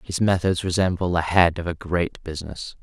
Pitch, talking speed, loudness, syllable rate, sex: 85 Hz, 190 wpm, -22 LUFS, 5.2 syllables/s, male